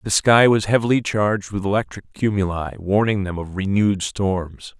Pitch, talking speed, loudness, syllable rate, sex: 100 Hz, 165 wpm, -20 LUFS, 5.0 syllables/s, male